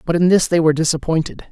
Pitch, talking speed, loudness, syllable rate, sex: 165 Hz, 240 wpm, -16 LUFS, 7.5 syllables/s, male